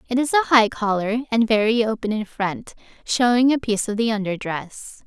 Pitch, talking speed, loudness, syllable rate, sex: 225 Hz, 200 wpm, -20 LUFS, 5.2 syllables/s, female